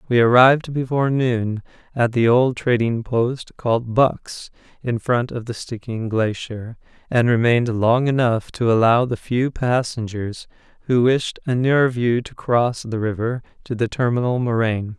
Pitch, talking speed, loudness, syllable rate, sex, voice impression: 120 Hz, 155 wpm, -19 LUFS, 4.5 syllables/s, male, very masculine, very adult-like, middle-aged, very thick, relaxed, weak, slightly dark, slightly soft, slightly muffled, fluent, slightly cool, intellectual, slightly refreshing, sincere, calm, slightly mature, slightly friendly, reassuring, elegant, slightly wild, slightly sweet, very kind, modest